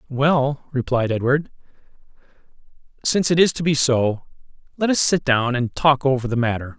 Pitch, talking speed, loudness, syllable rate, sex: 135 Hz, 160 wpm, -19 LUFS, 5.0 syllables/s, male